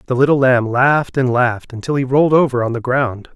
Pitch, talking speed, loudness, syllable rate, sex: 130 Hz, 230 wpm, -15 LUFS, 6.1 syllables/s, male